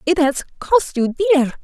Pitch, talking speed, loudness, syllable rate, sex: 310 Hz, 185 wpm, -17 LUFS, 4.6 syllables/s, female